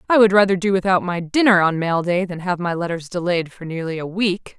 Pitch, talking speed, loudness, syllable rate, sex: 180 Hz, 250 wpm, -19 LUFS, 5.7 syllables/s, female